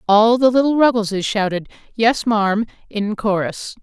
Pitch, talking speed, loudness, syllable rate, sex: 215 Hz, 140 wpm, -17 LUFS, 4.5 syllables/s, female